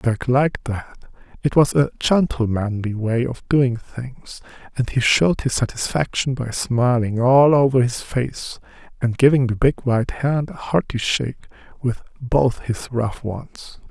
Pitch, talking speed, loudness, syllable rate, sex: 125 Hz, 155 wpm, -20 LUFS, 4.2 syllables/s, male